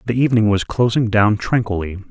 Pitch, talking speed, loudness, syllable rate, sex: 110 Hz, 170 wpm, -17 LUFS, 6.0 syllables/s, male